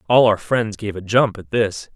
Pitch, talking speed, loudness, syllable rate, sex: 105 Hz, 245 wpm, -19 LUFS, 4.6 syllables/s, male